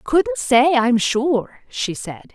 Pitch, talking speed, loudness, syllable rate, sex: 265 Hz, 155 wpm, -18 LUFS, 2.8 syllables/s, female